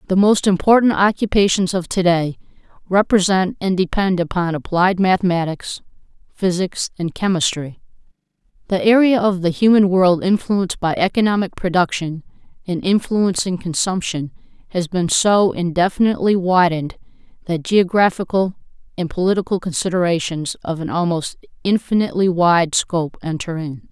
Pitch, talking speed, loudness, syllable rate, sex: 180 Hz, 115 wpm, -18 LUFS, 5.0 syllables/s, female